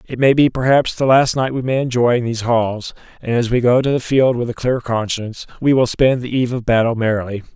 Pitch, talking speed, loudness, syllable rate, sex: 120 Hz, 255 wpm, -16 LUFS, 6.0 syllables/s, male